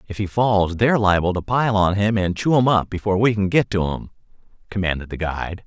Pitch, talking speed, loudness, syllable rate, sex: 100 Hz, 235 wpm, -20 LUFS, 5.9 syllables/s, male